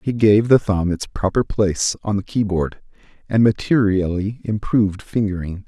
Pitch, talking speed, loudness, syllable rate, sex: 100 Hz, 150 wpm, -19 LUFS, 4.8 syllables/s, male